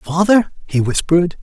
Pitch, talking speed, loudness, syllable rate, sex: 170 Hz, 125 wpm, -16 LUFS, 5.0 syllables/s, male